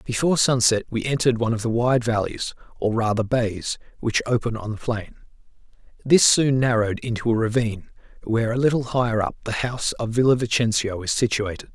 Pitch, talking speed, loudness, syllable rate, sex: 115 Hz, 180 wpm, -22 LUFS, 6.0 syllables/s, male